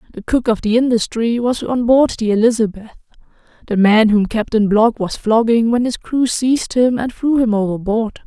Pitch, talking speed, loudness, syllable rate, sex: 230 Hz, 190 wpm, -16 LUFS, 5.1 syllables/s, female